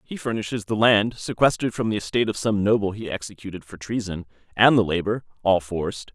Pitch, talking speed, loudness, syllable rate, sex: 105 Hz, 165 wpm, -23 LUFS, 6.1 syllables/s, male